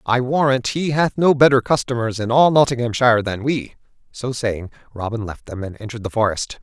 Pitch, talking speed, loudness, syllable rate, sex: 120 Hz, 190 wpm, -19 LUFS, 5.6 syllables/s, male